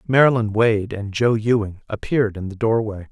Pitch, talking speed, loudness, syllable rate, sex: 110 Hz, 175 wpm, -20 LUFS, 5.1 syllables/s, male